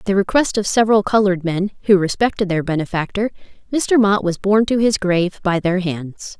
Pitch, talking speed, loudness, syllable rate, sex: 195 Hz, 195 wpm, -17 LUFS, 5.8 syllables/s, female